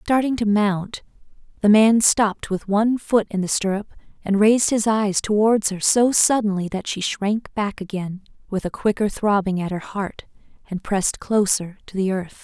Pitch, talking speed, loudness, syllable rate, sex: 205 Hz, 185 wpm, -20 LUFS, 4.8 syllables/s, female